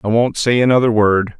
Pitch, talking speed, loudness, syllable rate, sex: 115 Hz, 215 wpm, -14 LUFS, 5.5 syllables/s, male